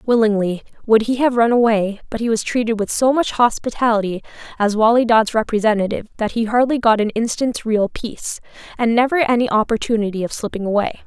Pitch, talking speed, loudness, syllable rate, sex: 225 Hz, 180 wpm, -18 LUFS, 5.9 syllables/s, female